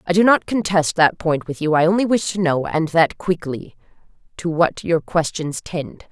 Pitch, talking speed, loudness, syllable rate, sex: 170 Hz, 205 wpm, -19 LUFS, 4.7 syllables/s, female